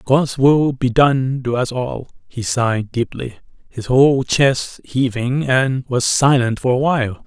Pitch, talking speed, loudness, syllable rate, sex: 130 Hz, 165 wpm, -17 LUFS, 4.0 syllables/s, male